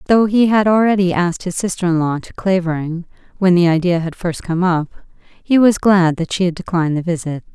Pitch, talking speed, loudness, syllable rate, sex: 180 Hz, 215 wpm, -16 LUFS, 5.5 syllables/s, female